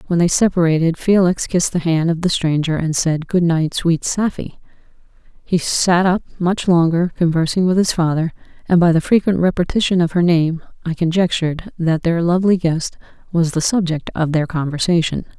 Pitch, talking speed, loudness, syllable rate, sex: 170 Hz, 175 wpm, -17 LUFS, 5.3 syllables/s, female